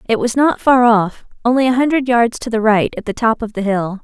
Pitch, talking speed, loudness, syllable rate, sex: 230 Hz, 270 wpm, -15 LUFS, 5.5 syllables/s, female